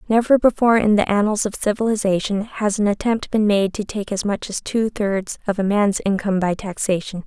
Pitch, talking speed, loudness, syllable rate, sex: 205 Hz, 205 wpm, -19 LUFS, 5.4 syllables/s, female